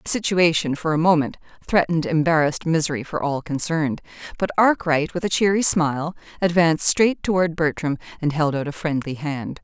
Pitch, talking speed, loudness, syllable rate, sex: 160 Hz, 170 wpm, -21 LUFS, 5.6 syllables/s, female